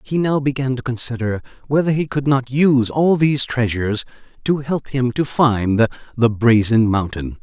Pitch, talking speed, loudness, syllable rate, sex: 130 Hz, 170 wpm, -18 LUFS, 4.8 syllables/s, male